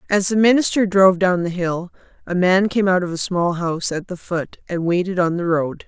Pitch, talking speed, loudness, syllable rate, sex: 180 Hz, 235 wpm, -19 LUFS, 5.3 syllables/s, female